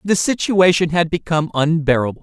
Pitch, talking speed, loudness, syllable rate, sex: 165 Hz, 135 wpm, -17 LUFS, 5.7 syllables/s, male